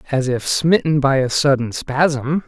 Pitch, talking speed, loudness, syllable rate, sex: 140 Hz, 170 wpm, -17 LUFS, 4.0 syllables/s, male